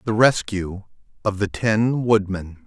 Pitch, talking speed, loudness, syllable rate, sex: 105 Hz, 135 wpm, -21 LUFS, 3.7 syllables/s, male